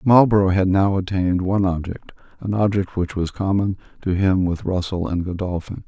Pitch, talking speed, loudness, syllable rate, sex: 95 Hz, 175 wpm, -20 LUFS, 5.3 syllables/s, male